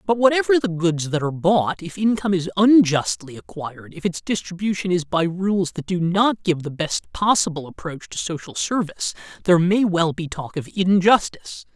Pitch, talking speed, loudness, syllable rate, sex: 180 Hz, 185 wpm, -21 LUFS, 5.2 syllables/s, male